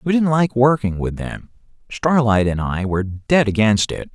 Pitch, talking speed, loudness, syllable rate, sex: 115 Hz, 190 wpm, -18 LUFS, 4.6 syllables/s, male